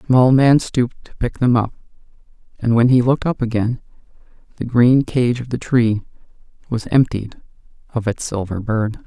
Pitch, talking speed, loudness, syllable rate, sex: 120 Hz, 170 wpm, -18 LUFS, 5.1 syllables/s, male